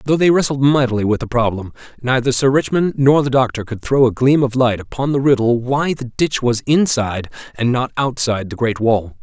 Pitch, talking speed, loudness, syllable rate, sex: 125 Hz, 215 wpm, -16 LUFS, 5.5 syllables/s, male